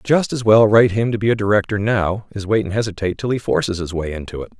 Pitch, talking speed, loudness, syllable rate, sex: 105 Hz, 275 wpm, -18 LUFS, 6.7 syllables/s, male